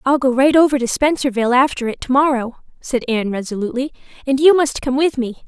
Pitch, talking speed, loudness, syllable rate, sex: 260 Hz, 195 wpm, -17 LUFS, 6.4 syllables/s, female